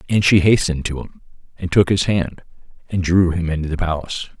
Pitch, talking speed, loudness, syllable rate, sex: 90 Hz, 205 wpm, -18 LUFS, 5.9 syllables/s, male